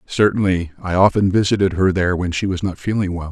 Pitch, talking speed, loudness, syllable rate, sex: 95 Hz, 215 wpm, -18 LUFS, 6.3 syllables/s, male